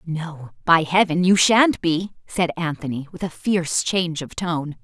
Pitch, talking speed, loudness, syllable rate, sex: 170 Hz, 175 wpm, -20 LUFS, 4.4 syllables/s, female